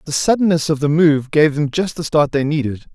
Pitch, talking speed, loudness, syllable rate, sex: 150 Hz, 245 wpm, -16 LUFS, 5.5 syllables/s, male